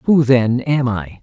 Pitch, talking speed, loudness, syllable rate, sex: 130 Hz, 195 wpm, -16 LUFS, 3.4 syllables/s, male